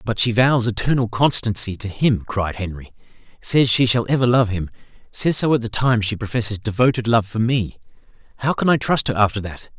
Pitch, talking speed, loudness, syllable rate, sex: 115 Hz, 195 wpm, -19 LUFS, 5.4 syllables/s, male